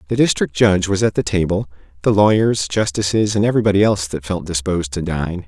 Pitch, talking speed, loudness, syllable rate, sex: 95 Hz, 195 wpm, -17 LUFS, 6.3 syllables/s, male